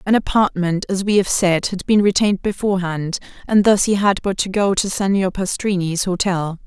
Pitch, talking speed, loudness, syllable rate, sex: 190 Hz, 190 wpm, -18 LUFS, 5.2 syllables/s, female